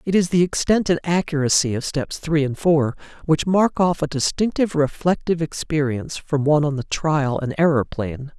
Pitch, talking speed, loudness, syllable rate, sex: 155 Hz, 185 wpm, -20 LUFS, 5.3 syllables/s, male